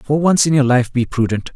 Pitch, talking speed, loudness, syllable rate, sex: 135 Hz, 270 wpm, -15 LUFS, 5.6 syllables/s, male